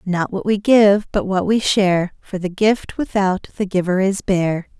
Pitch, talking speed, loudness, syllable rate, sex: 195 Hz, 200 wpm, -18 LUFS, 4.3 syllables/s, female